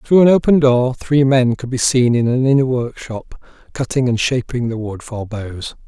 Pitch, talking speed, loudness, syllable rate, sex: 125 Hz, 205 wpm, -16 LUFS, 4.7 syllables/s, male